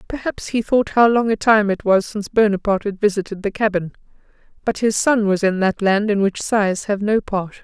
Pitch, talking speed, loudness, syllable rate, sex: 205 Hz, 220 wpm, -18 LUFS, 5.4 syllables/s, female